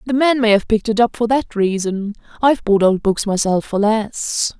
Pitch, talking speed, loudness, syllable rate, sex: 220 Hz, 210 wpm, -17 LUFS, 5.2 syllables/s, female